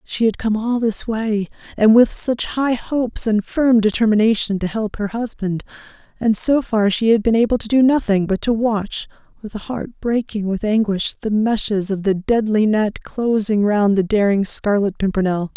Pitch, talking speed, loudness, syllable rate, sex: 215 Hz, 190 wpm, -18 LUFS, 4.7 syllables/s, female